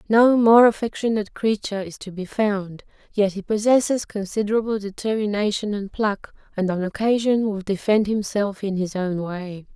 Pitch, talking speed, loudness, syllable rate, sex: 205 Hz, 155 wpm, -22 LUFS, 5.0 syllables/s, female